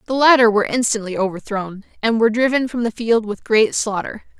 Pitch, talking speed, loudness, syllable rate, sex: 225 Hz, 190 wpm, -18 LUFS, 5.9 syllables/s, female